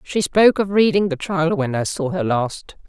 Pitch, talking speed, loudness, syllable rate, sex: 170 Hz, 230 wpm, -18 LUFS, 4.8 syllables/s, female